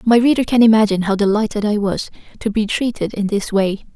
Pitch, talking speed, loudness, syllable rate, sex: 210 Hz, 215 wpm, -17 LUFS, 6.0 syllables/s, female